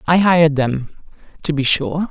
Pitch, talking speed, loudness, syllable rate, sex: 155 Hz, 170 wpm, -16 LUFS, 4.8 syllables/s, female